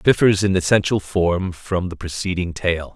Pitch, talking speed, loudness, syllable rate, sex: 90 Hz, 185 wpm, -20 LUFS, 4.9 syllables/s, male